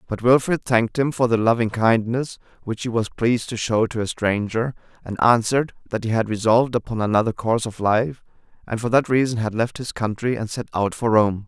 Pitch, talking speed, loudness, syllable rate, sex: 115 Hz, 215 wpm, -21 LUFS, 5.7 syllables/s, male